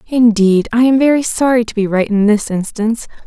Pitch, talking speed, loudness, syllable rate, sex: 225 Hz, 200 wpm, -13 LUFS, 5.5 syllables/s, female